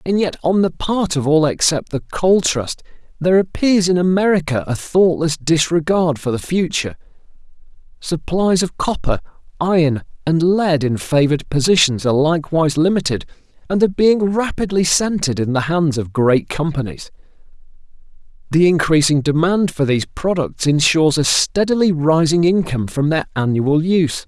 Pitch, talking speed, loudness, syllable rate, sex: 160 Hz, 145 wpm, -17 LUFS, 5.1 syllables/s, male